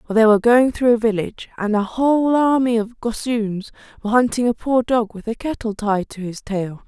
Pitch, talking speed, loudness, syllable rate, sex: 230 Hz, 220 wpm, -19 LUFS, 5.4 syllables/s, female